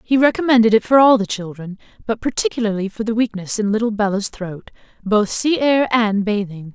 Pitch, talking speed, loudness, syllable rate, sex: 220 Hz, 180 wpm, -17 LUFS, 5.5 syllables/s, female